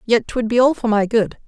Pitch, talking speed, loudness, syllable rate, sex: 225 Hz, 285 wpm, -17 LUFS, 5.3 syllables/s, female